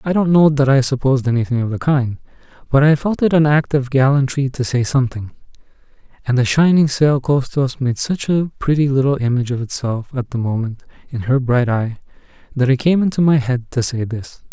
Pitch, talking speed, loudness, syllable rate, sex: 135 Hz, 215 wpm, -17 LUFS, 5.8 syllables/s, male